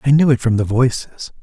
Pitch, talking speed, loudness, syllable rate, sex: 125 Hz, 255 wpm, -16 LUFS, 5.7 syllables/s, male